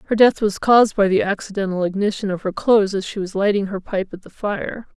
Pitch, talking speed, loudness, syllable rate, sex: 200 Hz, 240 wpm, -19 LUFS, 5.9 syllables/s, female